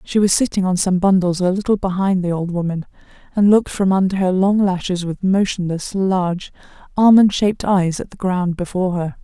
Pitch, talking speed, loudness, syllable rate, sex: 185 Hz, 195 wpm, -17 LUFS, 5.5 syllables/s, female